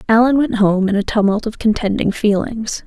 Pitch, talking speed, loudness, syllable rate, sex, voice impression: 215 Hz, 190 wpm, -16 LUFS, 5.2 syllables/s, female, feminine, adult-like, slightly muffled, calm, slightly kind